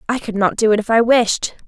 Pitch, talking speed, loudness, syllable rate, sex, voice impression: 220 Hz, 285 wpm, -16 LUFS, 5.6 syllables/s, female, feminine, slightly young, tensed, clear, cute, slightly refreshing, friendly, slightly kind